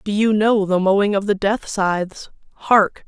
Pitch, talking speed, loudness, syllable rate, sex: 200 Hz, 195 wpm, -18 LUFS, 4.4 syllables/s, female